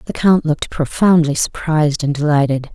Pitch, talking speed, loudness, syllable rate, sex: 155 Hz, 155 wpm, -16 LUFS, 5.4 syllables/s, female